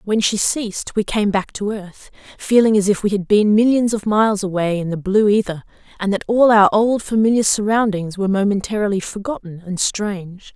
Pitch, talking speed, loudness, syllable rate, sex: 205 Hz, 195 wpm, -17 LUFS, 5.4 syllables/s, female